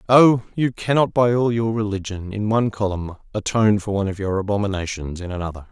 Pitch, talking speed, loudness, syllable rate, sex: 105 Hz, 190 wpm, -21 LUFS, 6.2 syllables/s, male